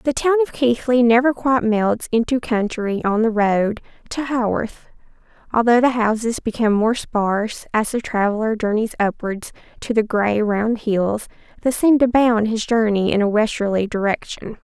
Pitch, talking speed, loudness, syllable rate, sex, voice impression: 225 Hz, 165 wpm, -19 LUFS, 4.6 syllables/s, female, feminine, adult-like, tensed, slightly bright, slightly muffled, fluent, intellectual, calm, friendly, reassuring, lively, kind